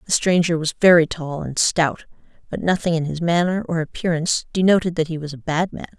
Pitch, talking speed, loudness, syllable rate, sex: 165 Hz, 210 wpm, -20 LUFS, 5.8 syllables/s, female